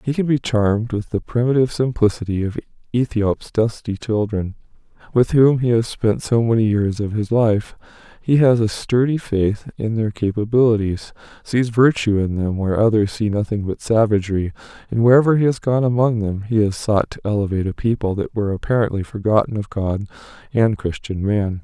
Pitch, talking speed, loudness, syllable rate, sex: 110 Hz, 180 wpm, -19 LUFS, 5.3 syllables/s, male